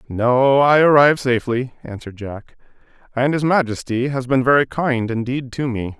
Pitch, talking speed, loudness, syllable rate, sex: 125 Hz, 160 wpm, -17 LUFS, 5.1 syllables/s, male